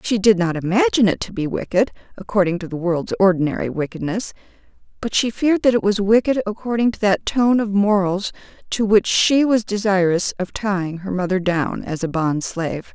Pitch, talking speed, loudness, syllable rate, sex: 195 Hz, 185 wpm, -19 LUFS, 5.5 syllables/s, female